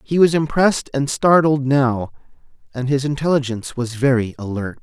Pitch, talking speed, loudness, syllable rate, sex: 135 Hz, 150 wpm, -18 LUFS, 5.2 syllables/s, male